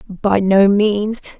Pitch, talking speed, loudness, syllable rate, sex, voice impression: 200 Hz, 130 wpm, -15 LUFS, 2.8 syllables/s, female, feminine, slightly young, soft, fluent, slightly raspy, cute, refreshing, calm, elegant, kind, modest